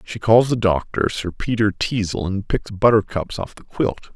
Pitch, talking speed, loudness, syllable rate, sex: 105 Hz, 190 wpm, -20 LUFS, 4.6 syllables/s, male